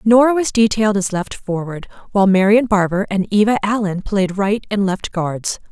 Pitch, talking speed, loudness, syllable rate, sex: 205 Hz, 180 wpm, -17 LUFS, 5.1 syllables/s, female